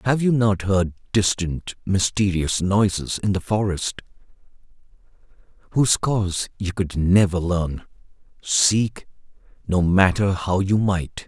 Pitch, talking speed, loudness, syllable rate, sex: 95 Hz, 115 wpm, -21 LUFS, 4.0 syllables/s, male